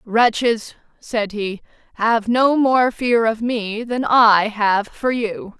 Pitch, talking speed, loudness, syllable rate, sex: 225 Hz, 150 wpm, -18 LUFS, 3.1 syllables/s, female